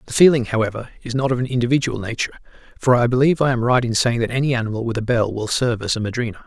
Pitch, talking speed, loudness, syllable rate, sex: 120 Hz, 260 wpm, -19 LUFS, 7.6 syllables/s, male